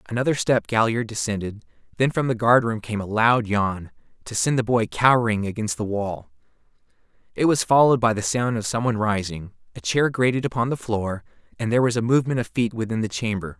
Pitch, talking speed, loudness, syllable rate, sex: 115 Hz, 200 wpm, -22 LUFS, 5.9 syllables/s, male